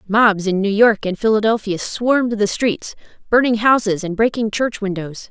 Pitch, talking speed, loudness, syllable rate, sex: 210 Hz, 170 wpm, -17 LUFS, 4.8 syllables/s, female